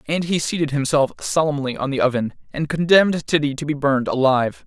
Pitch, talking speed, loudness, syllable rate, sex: 145 Hz, 195 wpm, -20 LUFS, 6.0 syllables/s, male